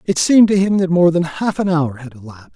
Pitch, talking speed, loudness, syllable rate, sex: 170 Hz, 280 wpm, -15 LUFS, 6.4 syllables/s, male